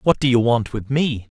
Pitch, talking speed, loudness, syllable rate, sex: 125 Hz, 260 wpm, -19 LUFS, 5.0 syllables/s, male